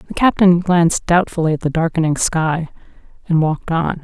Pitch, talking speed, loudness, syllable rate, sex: 165 Hz, 165 wpm, -16 LUFS, 5.3 syllables/s, female